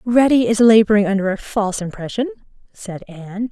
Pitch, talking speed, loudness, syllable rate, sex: 215 Hz, 155 wpm, -16 LUFS, 5.8 syllables/s, female